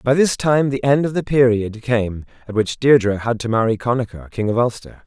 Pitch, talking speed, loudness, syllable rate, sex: 120 Hz, 225 wpm, -18 LUFS, 5.3 syllables/s, male